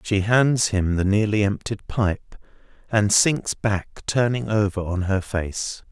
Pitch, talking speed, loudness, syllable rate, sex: 105 Hz, 150 wpm, -22 LUFS, 3.6 syllables/s, male